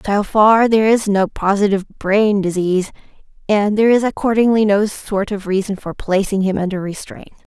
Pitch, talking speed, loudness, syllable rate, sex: 205 Hz, 165 wpm, -16 LUFS, 5.4 syllables/s, female